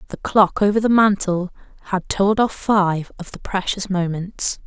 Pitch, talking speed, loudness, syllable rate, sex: 195 Hz, 165 wpm, -19 LUFS, 4.3 syllables/s, female